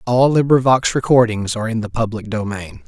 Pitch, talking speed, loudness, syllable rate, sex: 115 Hz, 165 wpm, -17 LUFS, 5.7 syllables/s, male